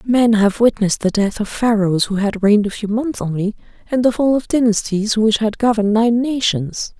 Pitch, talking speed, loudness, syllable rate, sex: 215 Hz, 205 wpm, -17 LUFS, 5.2 syllables/s, female